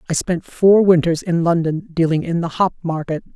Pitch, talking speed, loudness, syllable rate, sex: 170 Hz, 195 wpm, -17 LUFS, 5.1 syllables/s, female